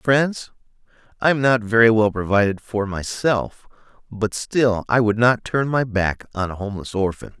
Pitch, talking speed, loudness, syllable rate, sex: 110 Hz, 170 wpm, -20 LUFS, 4.6 syllables/s, male